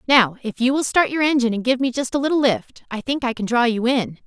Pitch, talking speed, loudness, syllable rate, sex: 250 Hz, 295 wpm, -20 LUFS, 6.2 syllables/s, female